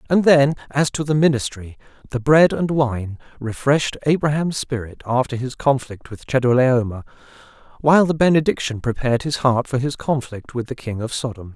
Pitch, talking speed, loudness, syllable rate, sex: 130 Hz, 160 wpm, -19 LUFS, 5.3 syllables/s, male